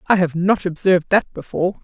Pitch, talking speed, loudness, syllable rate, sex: 185 Hz, 195 wpm, -18 LUFS, 5.9 syllables/s, female